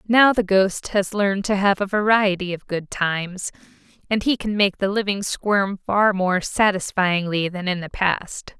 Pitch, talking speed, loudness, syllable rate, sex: 195 Hz, 180 wpm, -20 LUFS, 4.3 syllables/s, female